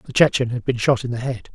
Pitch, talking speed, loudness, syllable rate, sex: 120 Hz, 310 wpm, -20 LUFS, 6.0 syllables/s, male